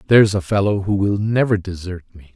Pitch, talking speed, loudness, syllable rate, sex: 100 Hz, 205 wpm, -18 LUFS, 5.8 syllables/s, male